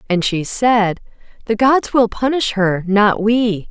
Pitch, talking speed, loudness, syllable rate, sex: 215 Hz, 160 wpm, -16 LUFS, 3.6 syllables/s, female